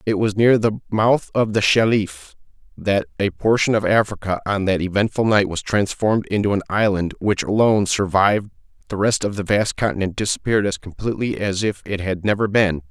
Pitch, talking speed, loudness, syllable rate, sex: 100 Hz, 185 wpm, -19 LUFS, 5.6 syllables/s, male